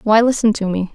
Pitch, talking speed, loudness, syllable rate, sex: 215 Hz, 255 wpm, -16 LUFS, 5.9 syllables/s, female